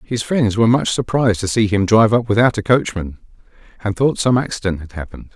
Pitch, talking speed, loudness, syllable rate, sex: 110 Hz, 215 wpm, -17 LUFS, 6.3 syllables/s, male